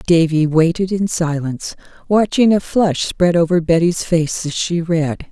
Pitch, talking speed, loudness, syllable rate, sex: 170 Hz, 160 wpm, -16 LUFS, 4.4 syllables/s, female